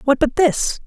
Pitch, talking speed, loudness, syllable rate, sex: 280 Hz, 210 wpm, -17 LUFS, 4.1 syllables/s, female